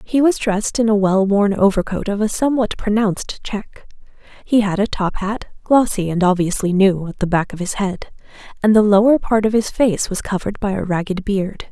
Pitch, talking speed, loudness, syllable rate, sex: 205 Hz, 210 wpm, -18 LUFS, 5.3 syllables/s, female